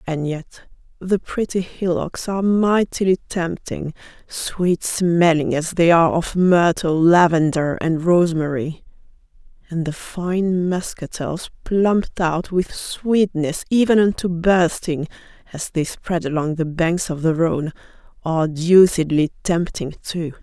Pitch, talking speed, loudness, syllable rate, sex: 170 Hz, 125 wpm, -19 LUFS, 4.0 syllables/s, female